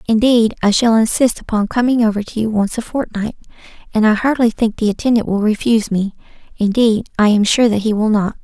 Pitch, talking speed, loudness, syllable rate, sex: 220 Hz, 200 wpm, -15 LUFS, 5.8 syllables/s, female